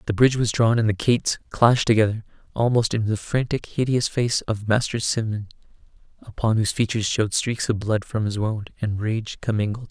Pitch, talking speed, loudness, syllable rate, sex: 110 Hz, 190 wpm, -22 LUFS, 5.6 syllables/s, male